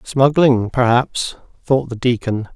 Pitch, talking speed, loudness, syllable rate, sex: 125 Hz, 115 wpm, -17 LUFS, 3.7 syllables/s, male